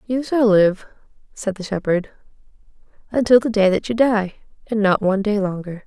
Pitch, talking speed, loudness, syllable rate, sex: 210 Hz, 175 wpm, -19 LUFS, 5.2 syllables/s, female